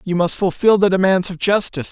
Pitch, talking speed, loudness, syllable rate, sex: 185 Hz, 220 wpm, -16 LUFS, 6.1 syllables/s, male